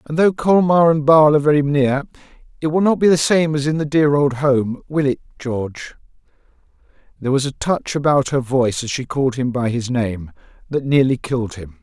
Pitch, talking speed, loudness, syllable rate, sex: 140 Hz, 205 wpm, -17 LUFS, 5.6 syllables/s, male